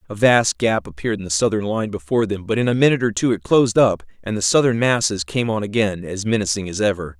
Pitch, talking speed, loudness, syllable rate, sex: 105 Hz, 250 wpm, -19 LUFS, 6.5 syllables/s, male